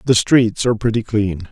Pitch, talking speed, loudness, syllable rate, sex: 110 Hz, 200 wpm, -16 LUFS, 5.5 syllables/s, male